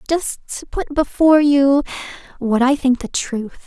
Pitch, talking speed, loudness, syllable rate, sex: 280 Hz, 165 wpm, -17 LUFS, 4.4 syllables/s, female